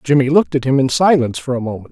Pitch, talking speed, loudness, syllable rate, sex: 135 Hz, 280 wpm, -15 LUFS, 7.6 syllables/s, male